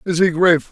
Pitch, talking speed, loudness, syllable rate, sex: 170 Hz, 250 wpm, -15 LUFS, 8.1 syllables/s, male